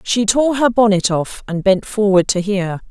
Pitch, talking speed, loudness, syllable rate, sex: 205 Hz, 205 wpm, -16 LUFS, 4.4 syllables/s, female